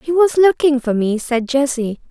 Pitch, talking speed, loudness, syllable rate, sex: 275 Hz, 200 wpm, -16 LUFS, 4.6 syllables/s, female